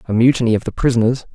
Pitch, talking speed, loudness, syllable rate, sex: 120 Hz, 225 wpm, -16 LUFS, 7.9 syllables/s, male